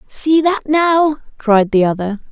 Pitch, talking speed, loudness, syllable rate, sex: 265 Hz, 155 wpm, -14 LUFS, 3.8 syllables/s, female